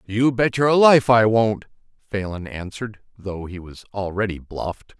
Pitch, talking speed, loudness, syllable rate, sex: 105 Hz, 155 wpm, -20 LUFS, 4.4 syllables/s, male